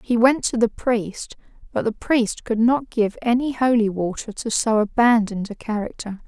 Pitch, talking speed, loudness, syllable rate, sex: 225 Hz, 180 wpm, -21 LUFS, 4.7 syllables/s, female